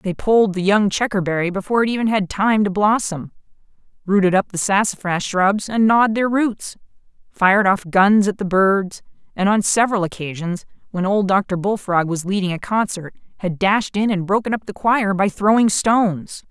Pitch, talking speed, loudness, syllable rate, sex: 200 Hz, 180 wpm, -18 LUFS, 5.1 syllables/s, female